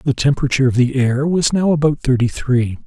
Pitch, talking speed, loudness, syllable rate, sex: 135 Hz, 210 wpm, -16 LUFS, 5.8 syllables/s, male